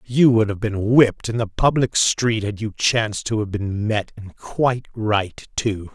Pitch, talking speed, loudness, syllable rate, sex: 110 Hz, 200 wpm, -20 LUFS, 4.3 syllables/s, male